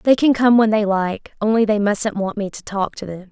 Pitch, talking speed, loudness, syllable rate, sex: 210 Hz, 270 wpm, -18 LUFS, 5.1 syllables/s, female